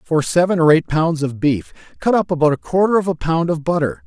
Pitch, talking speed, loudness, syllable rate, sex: 155 Hz, 250 wpm, -17 LUFS, 5.7 syllables/s, male